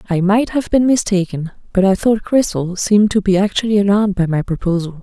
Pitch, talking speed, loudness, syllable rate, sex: 200 Hz, 205 wpm, -15 LUFS, 5.8 syllables/s, female